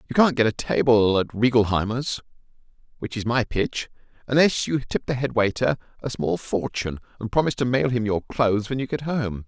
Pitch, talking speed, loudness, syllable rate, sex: 120 Hz, 195 wpm, -23 LUFS, 5.5 syllables/s, male